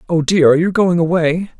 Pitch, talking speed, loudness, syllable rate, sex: 170 Hz, 225 wpm, -14 LUFS, 5.9 syllables/s, male